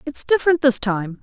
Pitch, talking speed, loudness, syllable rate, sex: 235 Hz, 195 wpm, -18 LUFS, 5.4 syllables/s, female